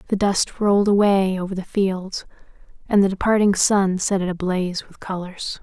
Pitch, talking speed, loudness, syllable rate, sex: 190 Hz, 170 wpm, -20 LUFS, 5.0 syllables/s, female